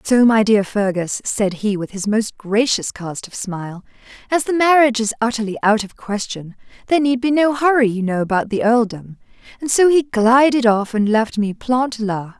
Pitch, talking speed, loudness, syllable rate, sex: 225 Hz, 200 wpm, -17 LUFS, 5.1 syllables/s, female